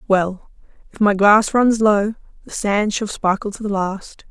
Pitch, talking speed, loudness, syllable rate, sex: 205 Hz, 180 wpm, -18 LUFS, 4.1 syllables/s, female